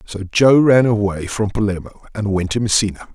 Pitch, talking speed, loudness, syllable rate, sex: 105 Hz, 190 wpm, -16 LUFS, 5.1 syllables/s, male